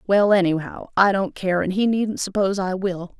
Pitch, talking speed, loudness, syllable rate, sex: 190 Hz, 205 wpm, -21 LUFS, 5.0 syllables/s, female